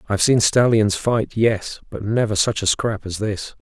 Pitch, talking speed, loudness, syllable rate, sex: 105 Hz, 195 wpm, -19 LUFS, 4.5 syllables/s, male